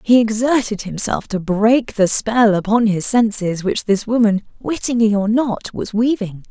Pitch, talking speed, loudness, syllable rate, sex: 220 Hz, 165 wpm, -17 LUFS, 4.5 syllables/s, female